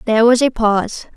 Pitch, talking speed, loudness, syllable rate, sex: 230 Hz, 205 wpm, -14 LUFS, 6.3 syllables/s, female